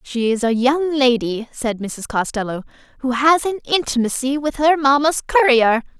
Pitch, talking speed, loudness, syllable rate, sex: 260 Hz, 160 wpm, -18 LUFS, 4.7 syllables/s, female